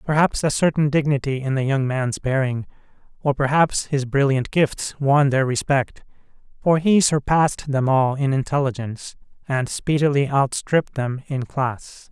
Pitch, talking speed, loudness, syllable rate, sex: 140 Hz, 150 wpm, -20 LUFS, 4.6 syllables/s, male